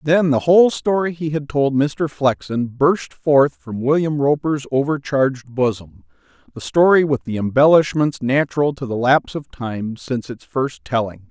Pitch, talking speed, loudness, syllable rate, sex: 140 Hz, 165 wpm, -18 LUFS, 4.6 syllables/s, male